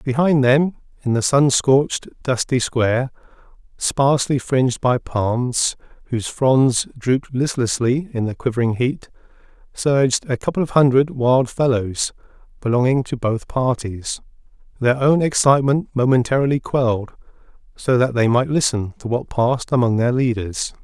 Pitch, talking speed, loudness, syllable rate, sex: 125 Hz, 135 wpm, -19 LUFS, 4.7 syllables/s, male